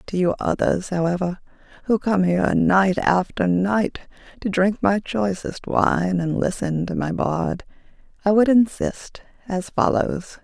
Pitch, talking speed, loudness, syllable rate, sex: 190 Hz, 145 wpm, -21 LUFS, 4.1 syllables/s, female